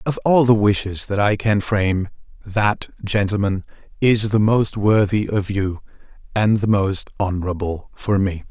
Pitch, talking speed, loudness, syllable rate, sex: 100 Hz, 155 wpm, -19 LUFS, 4.4 syllables/s, male